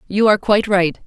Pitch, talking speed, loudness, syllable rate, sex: 200 Hz, 225 wpm, -16 LUFS, 6.7 syllables/s, female